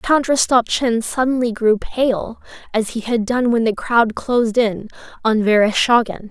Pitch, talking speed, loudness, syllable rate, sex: 230 Hz, 150 wpm, -17 LUFS, 4.3 syllables/s, female